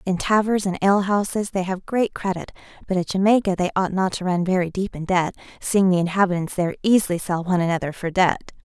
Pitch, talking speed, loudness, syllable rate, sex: 185 Hz, 205 wpm, -21 LUFS, 6.2 syllables/s, female